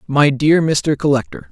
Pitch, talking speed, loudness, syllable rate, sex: 150 Hz, 160 wpm, -15 LUFS, 4.4 syllables/s, male